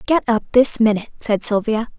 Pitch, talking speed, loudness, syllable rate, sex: 225 Hz, 180 wpm, -17 LUFS, 5.5 syllables/s, female